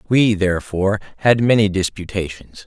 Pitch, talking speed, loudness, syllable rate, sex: 100 Hz, 110 wpm, -18 LUFS, 5.4 syllables/s, male